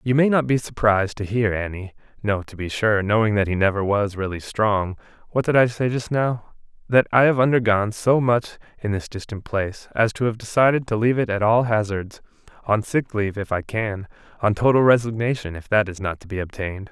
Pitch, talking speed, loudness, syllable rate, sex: 110 Hz, 210 wpm, -21 LUFS, 5.7 syllables/s, male